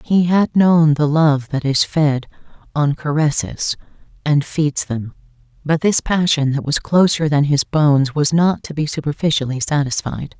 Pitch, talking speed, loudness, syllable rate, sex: 150 Hz, 160 wpm, -17 LUFS, 4.5 syllables/s, female